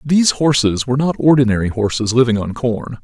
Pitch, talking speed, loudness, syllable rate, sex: 125 Hz, 180 wpm, -15 LUFS, 5.9 syllables/s, male